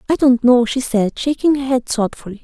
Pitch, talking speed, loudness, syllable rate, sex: 250 Hz, 220 wpm, -16 LUFS, 5.4 syllables/s, female